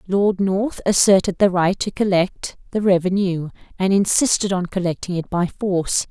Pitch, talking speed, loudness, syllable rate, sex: 190 Hz, 155 wpm, -19 LUFS, 4.8 syllables/s, female